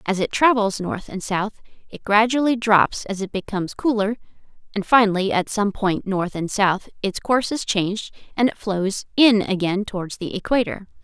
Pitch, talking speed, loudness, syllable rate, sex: 205 Hz, 180 wpm, -21 LUFS, 5.0 syllables/s, female